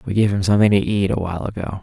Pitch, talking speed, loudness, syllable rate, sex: 100 Hz, 295 wpm, -18 LUFS, 7.6 syllables/s, male